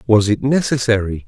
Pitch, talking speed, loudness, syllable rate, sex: 115 Hz, 140 wpm, -16 LUFS, 5.4 syllables/s, male